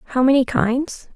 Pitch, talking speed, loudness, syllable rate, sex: 260 Hz, 155 wpm, -18 LUFS, 4.9 syllables/s, female